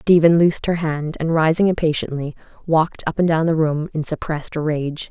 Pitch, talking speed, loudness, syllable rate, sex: 160 Hz, 190 wpm, -19 LUFS, 5.4 syllables/s, female